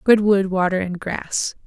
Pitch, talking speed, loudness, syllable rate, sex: 190 Hz, 180 wpm, -20 LUFS, 4.0 syllables/s, female